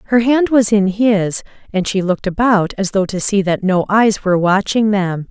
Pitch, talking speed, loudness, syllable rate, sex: 200 Hz, 215 wpm, -15 LUFS, 4.8 syllables/s, female